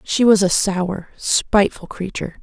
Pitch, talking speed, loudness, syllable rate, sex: 195 Hz, 150 wpm, -18 LUFS, 4.5 syllables/s, female